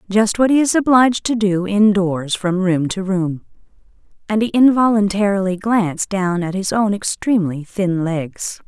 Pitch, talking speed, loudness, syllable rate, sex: 200 Hz, 160 wpm, -17 LUFS, 4.6 syllables/s, female